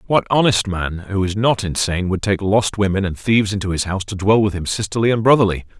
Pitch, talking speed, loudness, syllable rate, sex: 100 Hz, 240 wpm, -18 LUFS, 6.2 syllables/s, male